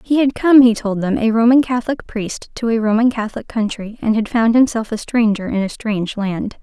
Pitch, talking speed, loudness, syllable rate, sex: 225 Hz, 225 wpm, -17 LUFS, 5.4 syllables/s, female